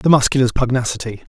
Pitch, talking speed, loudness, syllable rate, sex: 125 Hz, 135 wpm, -17 LUFS, 6.5 syllables/s, male